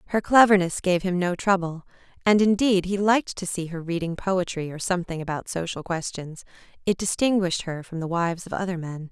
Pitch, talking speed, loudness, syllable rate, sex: 180 Hz, 190 wpm, -24 LUFS, 5.8 syllables/s, female